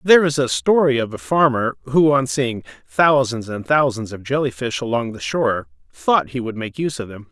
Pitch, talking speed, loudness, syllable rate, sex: 125 Hz, 215 wpm, -19 LUFS, 5.3 syllables/s, male